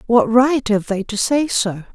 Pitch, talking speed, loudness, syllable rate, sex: 230 Hz, 215 wpm, -17 LUFS, 4.1 syllables/s, female